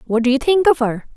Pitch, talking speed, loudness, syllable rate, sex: 275 Hz, 310 wpm, -16 LUFS, 6.2 syllables/s, female